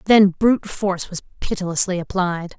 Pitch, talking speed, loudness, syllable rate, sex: 190 Hz, 140 wpm, -20 LUFS, 5.3 syllables/s, female